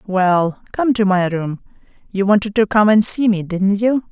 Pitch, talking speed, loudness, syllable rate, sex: 200 Hz, 205 wpm, -16 LUFS, 4.5 syllables/s, female